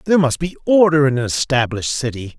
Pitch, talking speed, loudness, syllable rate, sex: 145 Hz, 200 wpm, -17 LUFS, 6.5 syllables/s, male